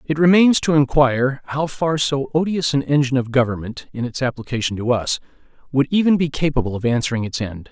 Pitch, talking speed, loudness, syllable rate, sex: 135 Hz, 195 wpm, -19 LUFS, 5.9 syllables/s, male